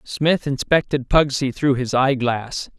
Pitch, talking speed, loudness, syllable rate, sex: 135 Hz, 130 wpm, -20 LUFS, 3.8 syllables/s, male